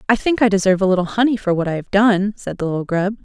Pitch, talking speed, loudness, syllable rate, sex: 200 Hz, 295 wpm, -17 LUFS, 7.0 syllables/s, female